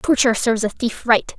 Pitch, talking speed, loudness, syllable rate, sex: 235 Hz, 215 wpm, -18 LUFS, 6.1 syllables/s, female